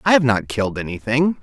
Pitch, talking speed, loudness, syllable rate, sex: 120 Hz, 210 wpm, -19 LUFS, 6.1 syllables/s, male